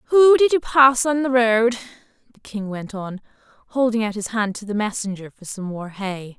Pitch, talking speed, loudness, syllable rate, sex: 225 Hz, 205 wpm, -20 LUFS, 4.8 syllables/s, female